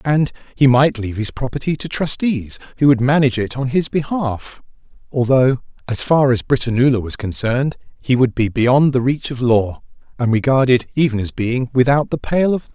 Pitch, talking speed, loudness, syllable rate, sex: 130 Hz, 190 wpm, -17 LUFS, 5.3 syllables/s, male